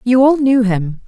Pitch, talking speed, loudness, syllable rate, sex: 235 Hz, 225 wpm, -13 LUFS, 4.3 syllables/s, female